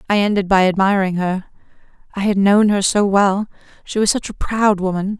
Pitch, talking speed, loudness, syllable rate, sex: 200 Hz, 185 wpm, -17 LUFS, 5.2 syllables/s, female